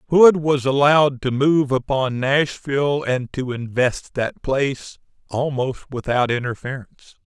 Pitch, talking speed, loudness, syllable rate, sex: 135 Hz, 125 wpm, -20 LUFS, 4.3 syllables/s, male